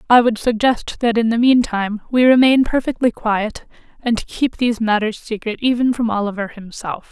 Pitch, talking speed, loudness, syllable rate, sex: 230 Hz, 170 wpm, -17 LUFS, 5.1 syllables/s, female